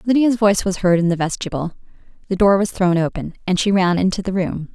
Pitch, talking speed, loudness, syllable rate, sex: 190 Hz, 230 wpm, -18 LUFS, 6.3 syllables/s, female